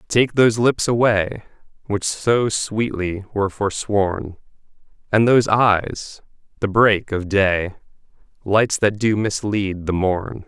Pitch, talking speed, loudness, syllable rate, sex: 105 Hz, 120 wpm, -19 LUFS, 3.7 syllables/s, male